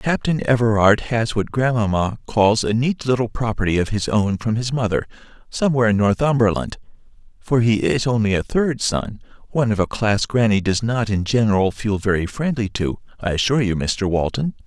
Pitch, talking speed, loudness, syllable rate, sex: 110 Hz, 185 wpm, -19 LUFS, 5.2 syllables/s, male